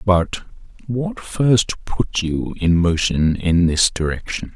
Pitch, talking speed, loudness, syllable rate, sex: 95 Hz, 130 wpm, -19 LUFS, 3.4 syllables/s, male